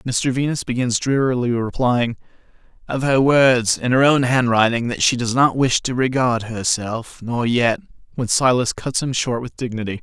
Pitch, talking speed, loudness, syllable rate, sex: 125 Hz, 175 wpm, -19 LUFS, 4.6 syllables/s, male